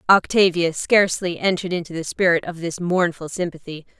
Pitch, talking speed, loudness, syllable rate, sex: 175 Hz, 150 wpm, -20 LUFS, 5.7 syllables/s, female